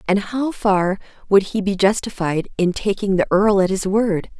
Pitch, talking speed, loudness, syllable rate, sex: 195 Hz, 190 wpm, -19 LUFS, 4.5 syllables/s, female